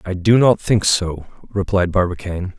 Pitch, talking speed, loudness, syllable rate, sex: 95 Hz, 160 wpm, -17 LUFS, 4.9 syllables/s, male